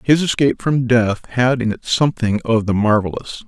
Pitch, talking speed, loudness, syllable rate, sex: 120 Hz, 190 wpm, -17 LUFS, 5.3 syllables/s, male